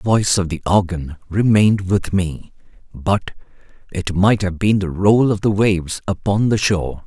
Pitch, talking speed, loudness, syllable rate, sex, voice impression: 95 Hz, 180 wpm, -18 LUFS, 4.8 syllables/s, male, masculine, very adult-like, clear, cool, calm, slightly mature, elegant, sweet, slightly kind